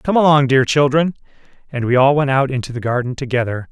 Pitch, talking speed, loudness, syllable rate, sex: 135 Hz, 210 wpm, -16 LUFS, 6.1 syllables/s, male